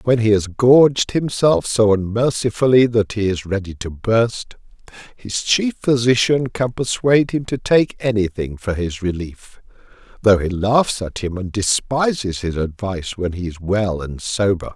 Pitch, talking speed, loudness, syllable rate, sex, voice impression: 110 Hz, 165 wpm, -18 LUFS, 4.3 syllables/s, male, masculine, slightly middle-aged, slightly muffled, slightly sincere, friendly